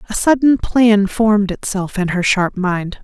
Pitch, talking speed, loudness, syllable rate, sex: 205 Hz, 180 wpm, -15 LUFS, 4.2 syllables/s, female